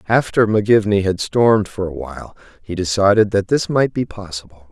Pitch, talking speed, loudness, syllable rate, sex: 105 Hz, 180 wpm, -17 LUFS, 5.7 syllables/s, male